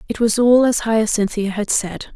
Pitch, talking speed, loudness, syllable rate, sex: 220 Hz, 195 wpm, -17 LUFS, 4.7 syllables/s, female